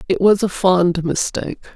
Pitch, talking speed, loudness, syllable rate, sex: 180 Hz, 170 wpm, -17 LUFS, 4.9 syllables/s, female